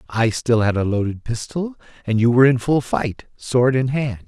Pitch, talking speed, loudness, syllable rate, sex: 125 Hz, 210 wpm, -19 LUFS, 4.8 syllables/s, male